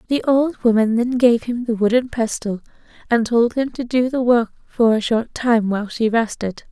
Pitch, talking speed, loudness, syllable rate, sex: 235 Hz, 205 wpm, -18 LUFS, 4.8 syllables/s, female